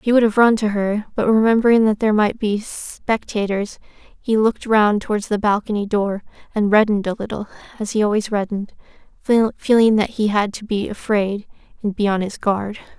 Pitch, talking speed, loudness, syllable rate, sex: 210 Hz, 185 wpm, -19 LUFS, 5.3 syllables/s, female